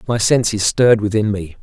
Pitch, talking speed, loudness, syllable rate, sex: 105 Hz, 185 wpm, -15 LUFS, 5.6 syllables/s, male